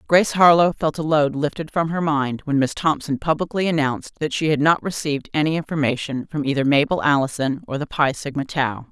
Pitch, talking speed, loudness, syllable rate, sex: 150 Hz, 200 wpm, -20 LUFS, 5.9 syllables/s, female